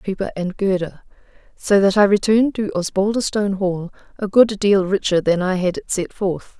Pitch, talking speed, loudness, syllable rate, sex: 200 Hz, 175 wpm, -18 LUFS, 5.0 syllables/s, female